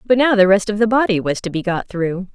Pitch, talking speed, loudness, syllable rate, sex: 200 Hz, 305 wpm, -17 LUFS, 5.9 syllables/s, female